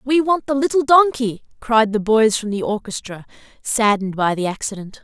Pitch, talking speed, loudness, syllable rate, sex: 230 Hz, 180 wpm, -18 LUFS, 5.2 syllables/s, female